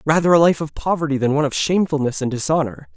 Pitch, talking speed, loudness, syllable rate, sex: 150 Hz, 225 wpm, -18 LUFS, 7.1 syllables/s, male